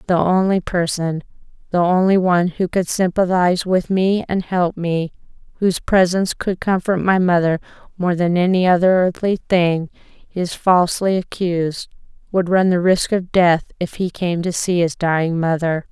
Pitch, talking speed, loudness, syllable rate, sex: 180 Hz, 145 wpm, -18 LUFS, 4.8 syllables/s, female